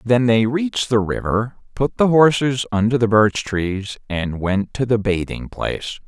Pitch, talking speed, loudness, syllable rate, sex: 115 Hz, 180 wpm, -19 LUFS, 4.3 syllables/s, male